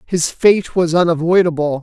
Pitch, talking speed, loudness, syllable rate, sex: 170 Hz, 130 wpm, -15 LUFS, 4.7 syllables/s, male